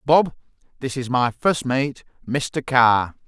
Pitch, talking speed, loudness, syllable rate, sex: 130 Hz, 145 wpm, -21 LUFS, 3.4 syllables/s, male